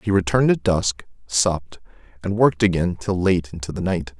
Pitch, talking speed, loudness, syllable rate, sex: 90 Hz, 185 wpm, -21 LUFS, 5.5 syllables/s, male